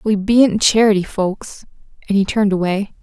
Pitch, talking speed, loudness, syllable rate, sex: 205 Hz, 180 wpm, -16 LUFS, 5.3 syllables/s, female